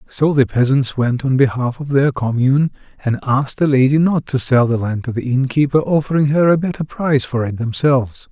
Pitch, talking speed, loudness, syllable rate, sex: 135 Hz, 210 wpm, -16 LUFS, 5.5 syllables/s, male